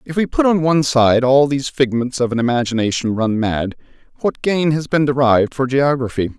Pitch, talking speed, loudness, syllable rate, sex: 135 Hz, 195 wpm, -17 LUFS, 5.6 syllables/s, male